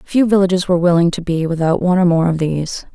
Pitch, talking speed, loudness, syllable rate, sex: 175 Hz, 245 wpm, -15 LUFS, 6.7 syllables/s, female